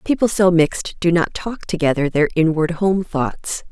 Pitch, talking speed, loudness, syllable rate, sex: 170 Hz, 180 wpm, -18 LUFS, 4.6 syllables/s, female